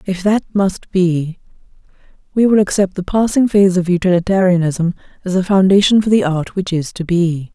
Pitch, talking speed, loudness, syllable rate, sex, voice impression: 185 Hz, 175 wpm, -15 LUFS, 5.3 syllables/s, female, very feminine, slightly gender-neutral, very adult-like, slightly thin, tensed, very powerful, dark, very hard, very clear, very fluent, slightly raspy, cool, very intellectual, very refreshing, sincere, calm, very friendly, very reassuring, very unique, very elegant, wild, very sweet, slightly lively, kind, slightly intense